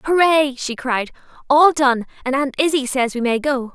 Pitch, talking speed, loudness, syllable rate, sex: 270 Hz, 190 wpm, -18 LUFS, 4.6 syllables/s, female